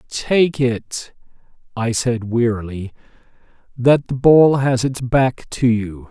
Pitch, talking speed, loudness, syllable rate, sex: 125 Hz, 130 wpm, -17 LUFS, 3.4 syllables/s, male